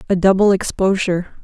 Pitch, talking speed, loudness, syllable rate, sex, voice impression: 190 Hz, 125 wpm, -16 LUFS, 6.3 syllables/s, female, feminine, adult-like, tensed, powerful, slightly dark, clear, fluent, intellectual, calm, slightly friendly, elegant, slightly lively